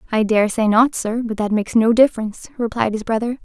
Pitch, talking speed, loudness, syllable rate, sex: 225 Hz, 225 wpm, -18 LUFS, 6.2 syllables/s, female